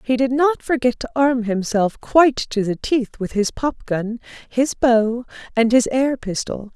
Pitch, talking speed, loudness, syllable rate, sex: 240 Hz, 185 wpm, -19 LUFS, 4.2 syllables/s, female